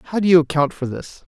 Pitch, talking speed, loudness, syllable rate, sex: 160 Hz, 270 wpm, -18 LUFS, 6.9 syllables/s, male